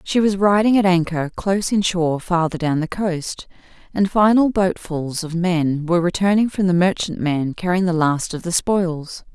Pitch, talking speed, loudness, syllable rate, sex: 180 Hz, 175 wpm, -19 LUFS, 4.7 syllables/s, female